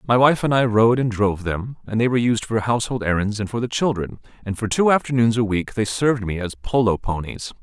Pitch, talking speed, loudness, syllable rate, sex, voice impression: 115 Hz, 245 wpm, -20 LUFS, 6.0 syllables/s, male, masculine, adult-like, tensed, powerful, slightly hard, cool, intellectual, calm, mature, reassuring, wild, lively, kind